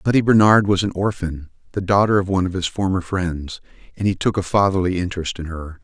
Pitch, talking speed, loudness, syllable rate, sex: 95 Hz, 215 wpm, -19 LUFS, 6.1 syllables/s, male